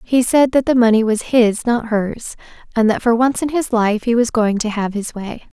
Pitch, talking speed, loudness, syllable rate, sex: 230 Hz, 245 wpm, -16 LUFS, 4.8 syllables/s, female